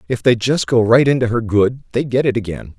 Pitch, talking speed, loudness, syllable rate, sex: 115 Hz, 260 wpm, -16 LUFS, 5.6 syllables/s, male